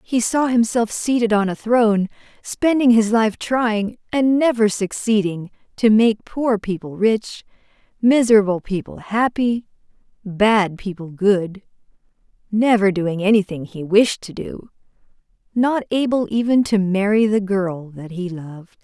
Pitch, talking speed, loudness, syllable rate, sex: 210 Hz, 135 wpm, -18 LUFS, 4.2 syllables/s, female